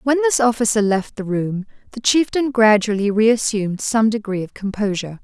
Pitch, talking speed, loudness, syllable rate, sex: 220 Hz, 160 wpm, -18 LUFS, 5.2 syllables/s, female